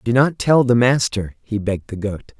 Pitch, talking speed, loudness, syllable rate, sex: 115 Hz, 225 wpm, -18 LUFS, 5.0 syllables/s, male